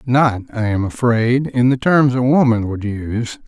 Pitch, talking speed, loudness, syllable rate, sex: 120 Hz, 190 wpm, -16 LUFS, 4.4 syllables/s, male